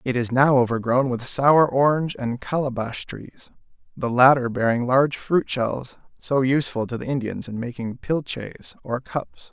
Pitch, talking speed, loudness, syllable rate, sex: 130 Hz, 165 wpm, -22 LUFS, 4.6 syllables/s, male